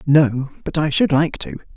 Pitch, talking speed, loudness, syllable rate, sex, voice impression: 145 Hz, 205 wpm, -19 LUFS, 4.6 syllables/s, male, very masculine, slightly old, very thick, slightly tensed, weak, slightly dark, soft, slightly muffled, fluent, raspy, cool, very intellectual, slightly refreshing, very sincere, very calm, very mature, friendly, reassuring, very unique, elegant, slightly wild, slightly sweet, lively, kind, slightly intense, slightly modest